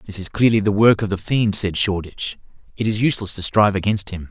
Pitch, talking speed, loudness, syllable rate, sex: 100 Hz, 235 wpm, -19 LUFS, 6.4 syllables/s, male